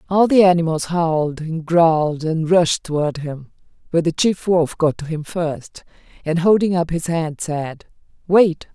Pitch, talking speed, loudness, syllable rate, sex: 165 Hz, 170 wpm, -18 LUFS, 4.3 syllables/s, female